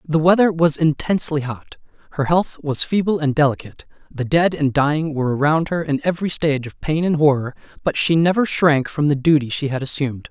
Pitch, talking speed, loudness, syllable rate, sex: 150 Hz, 205 wpm, -18 LUFS, 5.8 syllables/s, male